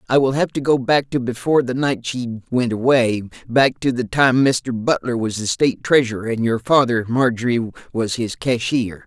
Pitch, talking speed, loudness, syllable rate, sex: 120 Hz, 190 wpm, -19 LUFS, 5.5 syllables/s, male